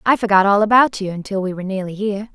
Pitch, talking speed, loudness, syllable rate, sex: 200 Hz, 255 wpm, -17 LUFS, 7.2 syllables/s, female